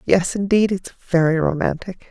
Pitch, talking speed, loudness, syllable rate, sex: 180 Hz, 145 wpm, -19 LUFS, 4.7 syllables/s, female